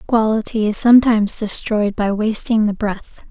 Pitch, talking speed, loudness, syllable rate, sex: 215 Hz, 165 wpm, -16 LUFS, 5.4 syllables/s, female